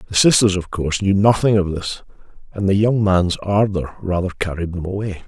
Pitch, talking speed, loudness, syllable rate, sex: 95 Hz, 195 wpm, -18 LUFS, 5.4 syllables/s, male